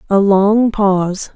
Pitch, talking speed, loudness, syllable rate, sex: 200 Hz, 130 wpm, -13 LUFS, 3.5 syllables/s, female